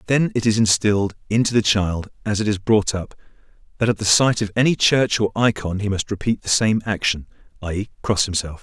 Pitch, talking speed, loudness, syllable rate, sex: 105 Hz, 210 wpm, -20 LUFS, 5.6 syllables/s, male